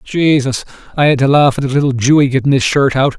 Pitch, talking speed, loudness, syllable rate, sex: 135 Hz, 245 wpm, -12 LUFS, 6.1 syllables/s, male